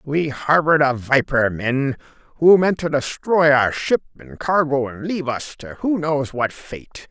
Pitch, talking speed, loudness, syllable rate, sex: 140 Hz, 175 wpm, -19 LUFS, 4.3 syllables/s, male